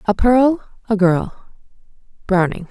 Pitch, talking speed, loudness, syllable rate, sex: 210 Hz, 110 wpm, -17 LUFS, 3.8 syllables/s, female